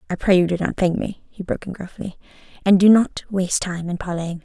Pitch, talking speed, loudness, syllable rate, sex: 185 Hz, 245 wpm, -20 LUFS, 6.1 syllables/s, female